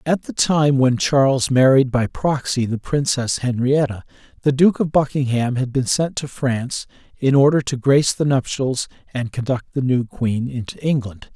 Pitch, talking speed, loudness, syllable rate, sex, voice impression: 130 Hz, 175 wpm, -19 LUFS, 4.7 syllables/s, male, very masculine, slightly old, thick, tensed, slightly powerful, bright, slightly soft, muffled, fluent, raspy, cool, intellectual, slightly refreshing, sincere, calm, friendly, reassuring, unique, slightly elegant, wild, slightly sweet, lively, kind, slightly modest